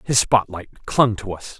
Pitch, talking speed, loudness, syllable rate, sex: 105 Hz, 190 wpm, -19 LUFS, 4.0 syllables/s, male